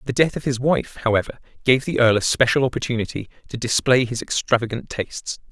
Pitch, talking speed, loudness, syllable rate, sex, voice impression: 125 Hz, 185 wpm, -21 LUFS, 6.0 syllables/s, male, masculine, adult-like, tensed, powerful, clear, fluent, intellectual, wild, lively, strict, slightly intense, light